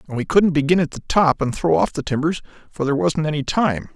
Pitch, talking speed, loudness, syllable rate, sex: 150 Hz, 260 wpm, -19 LUFS, 6.1 syllables/s, male